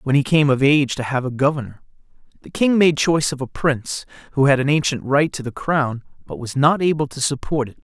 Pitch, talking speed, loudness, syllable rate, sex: 140 Hz, 235 wpm, -19 LUFS, 6.0 syllables/s, male